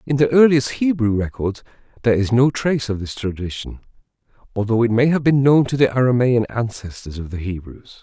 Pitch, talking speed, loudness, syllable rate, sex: 120 Hz, 185 wpm, -18 LUFS, 5.7 syllables/s, male